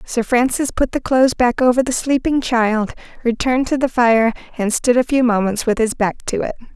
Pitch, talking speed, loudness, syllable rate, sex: 245 Hz, 215 wpm, -17 LUFS, 5.3 syllables/s, female